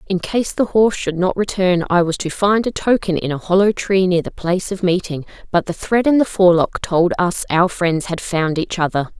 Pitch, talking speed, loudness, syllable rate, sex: 185 Hz, 235 wpm, -17 LUFS, 5.2 syllables/s, female